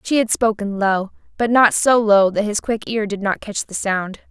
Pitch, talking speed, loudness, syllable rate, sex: 210 Hz, 235 wpm, -18 LUFS, 4.6 syllables/s, female